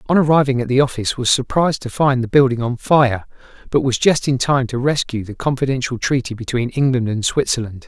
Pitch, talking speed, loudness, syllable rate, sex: 130 Hz, 205 wpm, -17 LUFS, 5.9 syllables/s, male